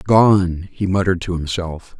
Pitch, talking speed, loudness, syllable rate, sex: 90 Hz, 150 wpm, -18 LUFS, 4.4 syllables/s, male